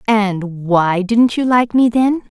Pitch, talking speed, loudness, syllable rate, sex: 215 Hz, 175 wpm, -15 LUFS, 3.4 syllables/s, female